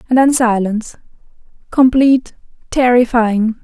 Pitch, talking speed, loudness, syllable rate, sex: 240 Hz, 65 wpm, -13 LUFS, 4.8 syllables/s, female